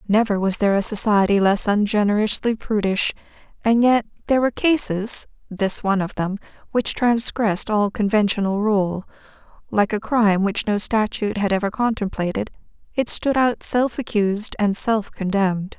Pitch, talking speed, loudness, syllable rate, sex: 210 Hz, 140 wpm, -20 LUFS, 5.1 syllables/s, female